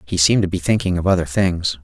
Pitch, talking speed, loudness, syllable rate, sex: 90 Hz, 260 wpm, -18 LUFS, 6.5 syllables/s, male